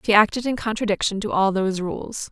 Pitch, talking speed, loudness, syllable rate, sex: 210 Hz, 210 wpm, -22 LUFS, 6.0 syllables/s, female